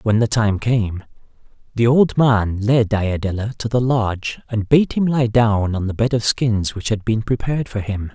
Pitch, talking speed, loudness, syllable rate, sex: 110 Hz, 205 wpm, -18 LUFS, 4.7 syllables/s, male